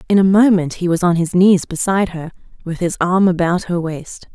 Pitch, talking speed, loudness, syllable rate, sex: 180 Hz, 220 wpm, -15 LUFS, 5.3 syllables/s, female